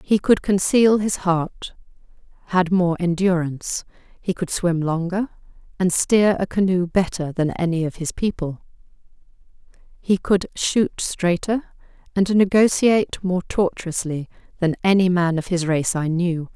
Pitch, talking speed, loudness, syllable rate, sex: 180 Hz, 140 wpm, -20 LUFS, 4.3 syllables/s, female